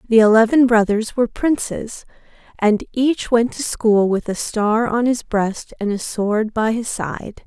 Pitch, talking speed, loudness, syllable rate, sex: 225 Hz, 175 wpm, -18 LUFS, 4.1 syllables/s, female